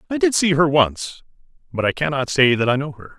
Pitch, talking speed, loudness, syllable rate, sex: 145 Hz, 245 wpm, -18 LUFS, 5.6 syllables/s, male